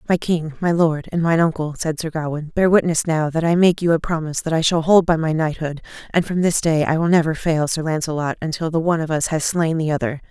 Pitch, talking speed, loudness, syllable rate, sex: 160 Hz, 260 wpm, -19 LUFS, 5.9 syllables/s, female